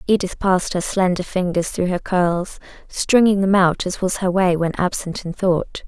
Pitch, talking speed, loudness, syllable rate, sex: 185 Hz, 195 wpm, -19 LUFS, 4.6 syllables/s, female